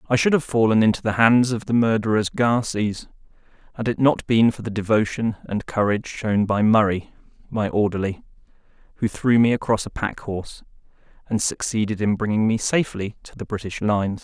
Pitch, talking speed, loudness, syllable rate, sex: 110 Hz, 175 wpm, -21 LUFS, 5.5 syllables/s, male